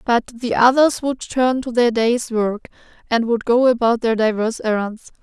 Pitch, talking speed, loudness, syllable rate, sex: 235 Hz, 185 wpm, -18 LUFS, 4.3 syllables/s, female